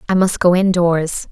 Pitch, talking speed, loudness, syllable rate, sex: 180 Hz, 230 wpm, -15 LUFS, 4.4 syllables/s, female